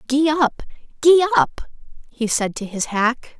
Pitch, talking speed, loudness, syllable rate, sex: 265 Hz, 160 wpm, -19 LUFS, 4.3 syllables/s, female